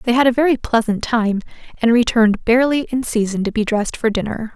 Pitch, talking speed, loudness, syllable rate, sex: 230 Hz, 210 wpm, -17 LUFS, 6.1 syllables/s, female